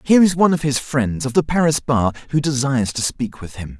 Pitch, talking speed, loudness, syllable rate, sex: 135 Hz, 255 wpm, -18 LUFS, 6.0 syllables/s, male